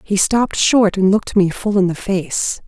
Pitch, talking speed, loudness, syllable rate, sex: 200 Hz, 225 wpm, -16 LUFS, 4.7 syllables/s, female